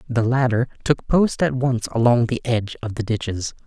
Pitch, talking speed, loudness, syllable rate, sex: 120 Hz, 195 wpm, -21 LUFS, 5.1 syllables/s, male